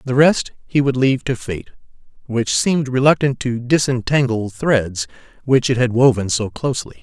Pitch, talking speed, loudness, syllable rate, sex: 125 Hz, 160 wpm, -18 LUFS, 5.0 syllables/s, male